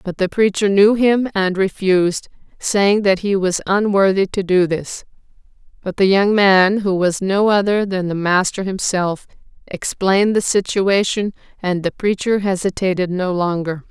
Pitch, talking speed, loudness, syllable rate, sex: 190 Hz, 155 wpm, -17 LUFS, 4.4 syllables/s, female